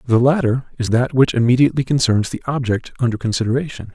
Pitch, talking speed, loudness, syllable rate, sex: 125 Hz, 165 wpm, -18 LUFS, 6.5 syllables/s, male